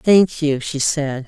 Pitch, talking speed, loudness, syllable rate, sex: 150 Hz, 190 wpm, -18 LUFS, 3.3 syllables/s, female